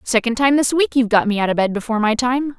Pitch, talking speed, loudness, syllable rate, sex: 240 Hz, 300 wpm, -17 LUFS, 6.8 syllables/s, female